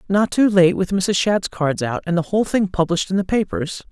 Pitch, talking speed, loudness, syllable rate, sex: 185 Hz, 245 wpm, -19 LUFS, 5.5 syllables/s, female